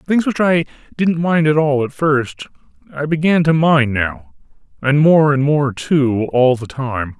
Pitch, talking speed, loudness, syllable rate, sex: 145 Hz, 175 wpm, -15 LUFS, 3.9 syllables/s, male